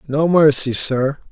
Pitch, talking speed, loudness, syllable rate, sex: 145 Hz, 135 wpm, -16 LUFS, 3.9 syllables/s, male